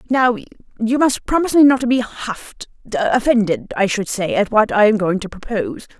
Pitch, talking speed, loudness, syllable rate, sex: 225 Hz, 180 wpm, -17 LUFS, 5.3 syllables/s, female